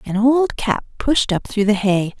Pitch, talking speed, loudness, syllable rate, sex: 220 Hz, 220 wpm, -18 LUFS, 4.1 syllables/s, female